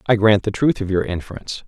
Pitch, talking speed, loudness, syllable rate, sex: 105 Hz, 250 wpm, -19 LUFS, 6.5 syllables/s, male